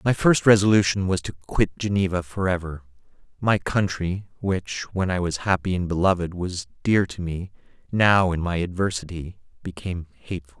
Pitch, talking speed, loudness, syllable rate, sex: 90 Hz, 155 wpm, -23 LUFS, 5.0 syllables/s, male